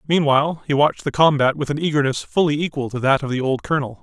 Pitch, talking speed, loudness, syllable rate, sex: 145 Hz, 240 wpm, -19 LUFS, 6.8 syllables/s, male